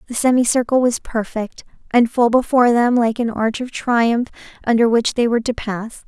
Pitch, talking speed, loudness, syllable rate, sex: 235 Hz, 190 wpm, -17 LUFS, 5.1 syllables/s, female